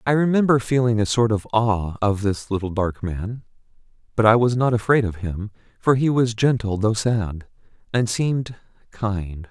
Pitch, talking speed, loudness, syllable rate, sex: 110 Hz, 170 wpm, -21 LUFS, 4.7 syllables/s, male